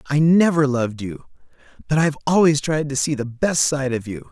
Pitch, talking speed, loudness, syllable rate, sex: 140 Hz, 225 wpm, -19 LUFS, 5.4 syllables/s, male